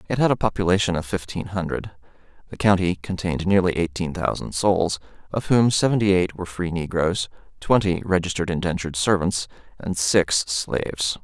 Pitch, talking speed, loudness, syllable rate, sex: 90 Hz, 150 wpm, -22 LUFS, 5.5 syllables/s, male